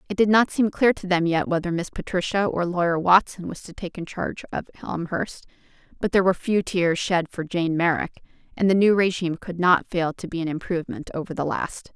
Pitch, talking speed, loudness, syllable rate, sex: 180 Hz, 215 wpm, -23 LUFS, 5.7 syllables/s, female